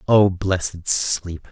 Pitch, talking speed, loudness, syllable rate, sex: 90 Hz, 120 wpm, -20 LUFS, 3.0 syllables/s, male